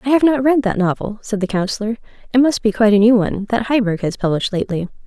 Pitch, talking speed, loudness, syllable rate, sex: 220 Hz, 250 wpm, -17 LUFS, 7.1 syllables/s, female